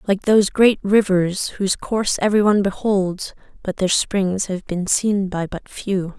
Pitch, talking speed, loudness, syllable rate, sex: 195 Hz, 165 wpm, -19 LUFS, 4.4 syllables/s, female